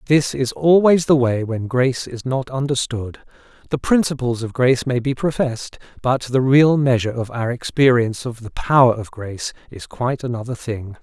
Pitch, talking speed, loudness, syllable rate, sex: 125 Hz, 180 wpm, -19 LUFS, 5.3 syllables/s, male